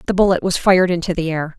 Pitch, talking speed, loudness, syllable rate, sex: 180 Hz, 265 wpm, -17 LUFS, 7.0 syllables/s, female